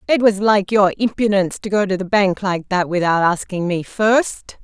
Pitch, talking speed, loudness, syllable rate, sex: 195 Hz, 205 wpm, -17 LUFS, 5.0 syllables/s, female